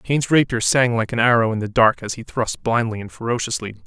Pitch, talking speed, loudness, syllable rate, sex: 115 Hz, 235 wpm, -19 LUFS, 5.9 syllables/s, male